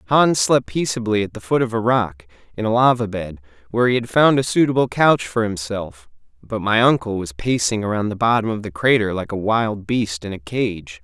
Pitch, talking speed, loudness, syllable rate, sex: 110 Hz, 215 wpm, -19 LUFS, 5.3 syllables/s, male